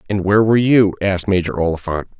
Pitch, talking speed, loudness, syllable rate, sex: 100 Hz, 190 wpm, -16 LUFS, 7.1 syllables/s, male